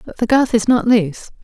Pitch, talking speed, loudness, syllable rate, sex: 230 Hz, 250 wpm, -15 LUFS, 5.8 syllables/s, female